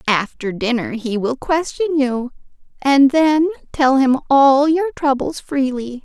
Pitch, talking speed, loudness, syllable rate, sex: 270 Hz, 140 wpm, -17 LUFS, 3.8 syllables/s, female